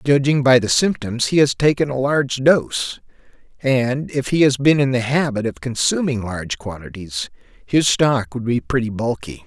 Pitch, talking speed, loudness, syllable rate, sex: 130 Hz, 175 wpm, -18 LUFS, 4.7 syllables/s, male